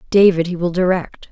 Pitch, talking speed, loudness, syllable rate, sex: 180 Hz, 180 wpm, -16 LUFS, 5.4 syllables/s, female